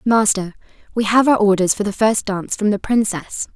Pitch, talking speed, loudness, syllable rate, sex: 210 Hz, 200 wpm, -17 LUFS, 5.3 syllables/s, female